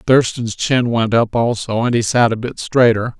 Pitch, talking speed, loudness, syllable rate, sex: 115 Hz, 205 wpm, -16 LUFS, 4.5 syllables/s, male